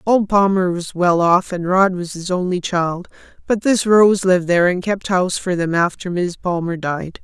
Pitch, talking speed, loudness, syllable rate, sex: 180 Hz, 205 wpm, -17 LUFS, 4.8 syllables/s, female